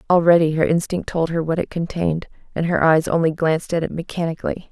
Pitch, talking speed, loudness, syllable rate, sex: 165 Hz, 205 wpm, -20 LUFS, 6.3 syllables/s, female